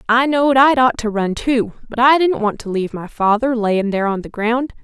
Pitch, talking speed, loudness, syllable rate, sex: 235 Hz, 250 wpm, -16 LUFS, 5.5 syllables/s, female